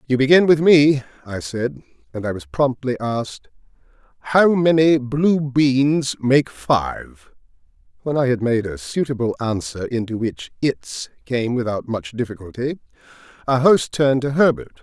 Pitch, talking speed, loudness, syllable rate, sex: 130 Hz, 145 wpm, -19 LUFS, 4.4 syllables/s, male